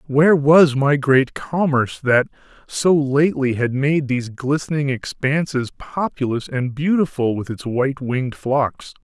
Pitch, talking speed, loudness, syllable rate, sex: 140 Hz, 140 wpm, -19 LUFS, 4.4 syllables/s, male